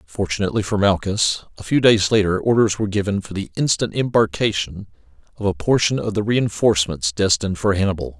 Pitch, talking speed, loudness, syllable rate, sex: 100 Hz, 170 wpm, -19 LUFS, 6.0 syllables/s, male